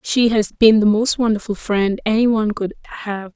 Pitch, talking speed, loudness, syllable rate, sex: 215 Hz, 195 wpm, -17 LUFS, 5.3 syllables/s, female